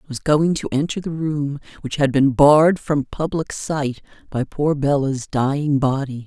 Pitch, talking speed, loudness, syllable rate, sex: 145 Hz, 180 wpm, -19 LUFS, 4.4 syllables/s, female